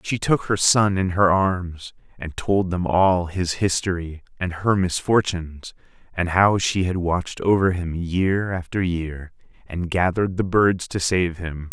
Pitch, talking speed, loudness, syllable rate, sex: 90 Hz, 170 wpm, -21 LUFS, 4.1 syllables/s, male